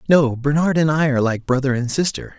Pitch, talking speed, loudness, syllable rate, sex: 140 Hz, 225 wpm, -18 LUFS, 5.9 syllables/s, male